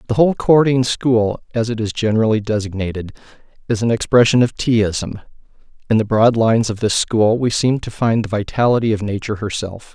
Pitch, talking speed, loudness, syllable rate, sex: 115 Hz, 180 wpm, -17 LUFS, 5.7 syllables/s, male